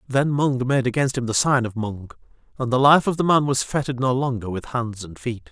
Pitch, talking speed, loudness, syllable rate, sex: 125 Hz, 250 wpm, -21 LUFS, 5.5 syllables/s, male